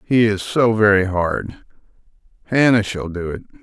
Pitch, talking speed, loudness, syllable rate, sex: 105 Hz, 150 wpm, -18 LUFS, 4.6 syllables/s, male